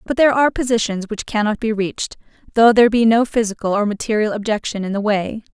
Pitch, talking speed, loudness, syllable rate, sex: 220 Hz, 205 wpm, -18 LUFS, 6.5 syllables/s, female